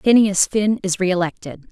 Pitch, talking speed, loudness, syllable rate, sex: 190 Hz, 140 wpm, -18 LUFS, 4.9 syllables/s, female